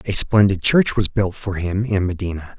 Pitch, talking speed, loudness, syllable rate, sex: 100 Hz, 210 wpm, -18 LUFS, 4.8 syllables/s, male